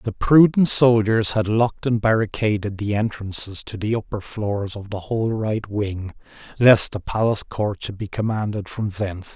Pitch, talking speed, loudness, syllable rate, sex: 105 Hz, 175 wpm, -21 LUFS, 4.8 syllables/s, male